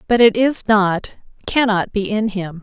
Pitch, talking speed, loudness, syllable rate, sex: 210 Hz, 185 wpm, -17 LUFS, 4.1 syllables/s, female